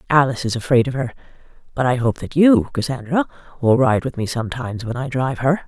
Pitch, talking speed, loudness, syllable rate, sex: 130 Hz, 210 wpm, -19 LUFS, 6.5 syllables/s, female